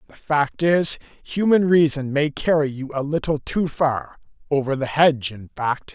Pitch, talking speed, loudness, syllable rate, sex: 145 Hz, 160 wpm, -21 LUFS, 4.4 syllables/s, male